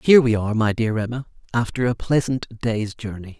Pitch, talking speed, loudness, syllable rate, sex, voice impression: 115 Hz, 195 wpm, -22 LUFS, 5.6 syllables/s, male, masculine, adult-like, slightly muffled, sincere, calm, slightly reassuring